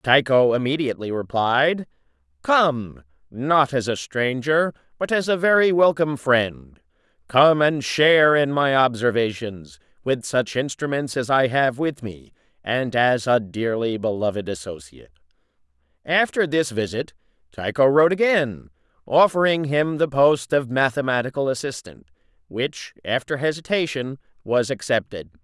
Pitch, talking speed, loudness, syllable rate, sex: 130 Hz, 125 wpm, -21 LUFS, 4.5 syllables/s, male